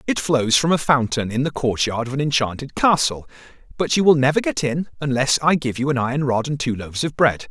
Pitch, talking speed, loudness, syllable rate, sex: 135 Hz, 240 wpm, -20 LUFS, 5.8 syllables/s, male